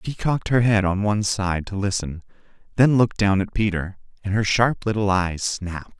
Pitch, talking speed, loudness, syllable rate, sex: 100 Hz, 200 wpm, -21 LUFS, 5.4 syllables/s, male